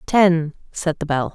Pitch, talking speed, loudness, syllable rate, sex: 165 Hz, 180 wpm, -20 LUFS, 3.8 syllables/s, female